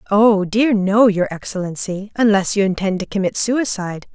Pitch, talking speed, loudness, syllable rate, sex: 200 Hz, 160 wpm, -17 LUFS, 4.9 syllables/s, female